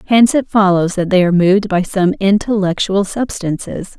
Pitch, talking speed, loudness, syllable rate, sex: 195 Hz, 165 wpm, -14 LUFS, 5.3 syllables/s, female